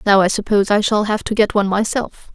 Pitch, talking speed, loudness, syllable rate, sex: 205 Hz, 255 wpm, -17 LUFS, 6.3 syllables/s, female